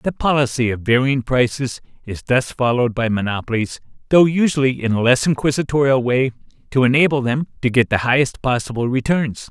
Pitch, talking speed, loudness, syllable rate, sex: 130 Hz, 165 wpm, -18 LUFS, 5.6 syllables/s, male